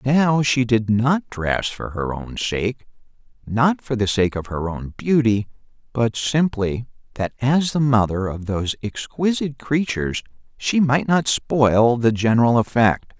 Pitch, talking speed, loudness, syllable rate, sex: 120 Hz, 155 wpm, -20 LUFS, 4.1 syllables/s, male